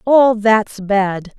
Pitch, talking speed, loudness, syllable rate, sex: 215 Hz, 130 wpm, -15 LUFS, 2.4 syllables/s, female